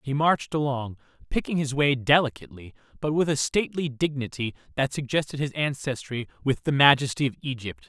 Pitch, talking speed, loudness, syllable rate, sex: 140 Hz, 160 wpm, -25 LUFS, 5.8 syllables/s, male